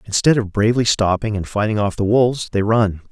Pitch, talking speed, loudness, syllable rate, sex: 105 Hz, 210 wpm, -18 LUFS, 5.9 syllables/s, male